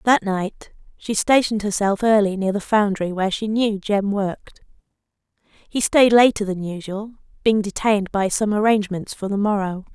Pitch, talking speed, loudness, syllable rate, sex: 205 Hz, 165 wpm, -20 LUFS, 5.0 syllables/s, female